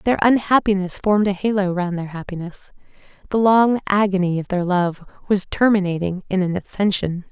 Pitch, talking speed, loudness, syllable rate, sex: 190 Hz, 155 wpm, -19 LUFS, 5.3 syllables/s, female